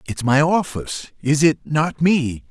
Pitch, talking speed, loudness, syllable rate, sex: 150 Hz, 145 wpm, -19 LUFS, 4.0 syllables/s, male